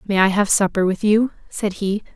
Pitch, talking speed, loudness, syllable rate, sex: 200 Hz, 220 wpm, -19 LUFS, 5.2 syllables/s, female